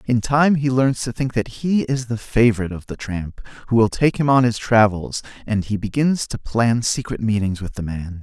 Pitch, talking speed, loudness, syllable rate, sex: 115 Hz, 225 wpm, -20 LUFS, 5.0 syllables/s, male